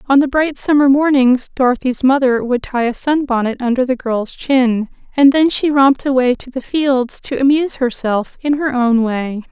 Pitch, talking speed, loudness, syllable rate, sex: 260 Hz, 195 wpm, -15 LUFS, 4.8 syllables/s, female